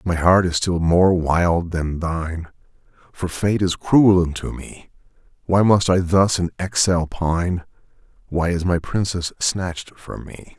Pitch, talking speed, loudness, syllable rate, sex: 90 Hz, 160 wpm, -19 LUFS, 4.0 syllables/s, male